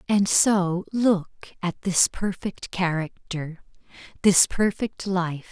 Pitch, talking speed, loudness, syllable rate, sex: 185 Hz, 110 wpm, -23 LUFS, 3.3 syllables/s, female